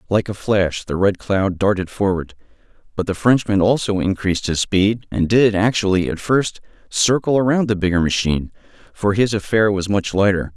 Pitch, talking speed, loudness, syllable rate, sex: 100 Hz, 175 wpm, -18 LUFS, 5.1 syllables/s, male